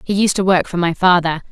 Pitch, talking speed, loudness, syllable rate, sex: 180 Hz, 275 wpm, -15 LUFS, 5.8 syllables/s, female